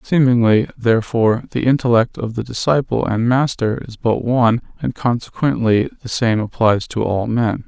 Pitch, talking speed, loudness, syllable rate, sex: 120 Hz, 155 wpm, -17 LUFS, 5.0 syllables/s, male